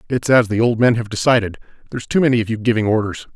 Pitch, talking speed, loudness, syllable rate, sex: 115 Hz, 235 wpm, -17 LUFS, 7.3 syllables/s, male